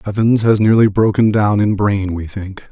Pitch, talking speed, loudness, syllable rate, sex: 105 Hz, 200 wpm, -14 LUFS, 4.6 syllables/s, male